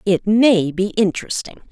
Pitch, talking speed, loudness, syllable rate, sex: 200 Hz, 140 wpm, -17 LUFS, 4.6 syllables/s, female